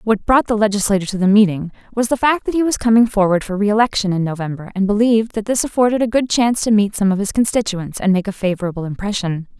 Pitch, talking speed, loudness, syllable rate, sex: 210 Hz, 240 wpm, -17 LUFS, 6.6 syllables/s, female